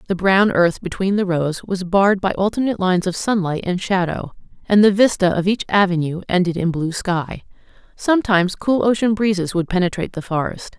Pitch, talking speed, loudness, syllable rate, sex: 190 Hz, 185 wpm, -18 LUFS, 5.6 syllables/s, female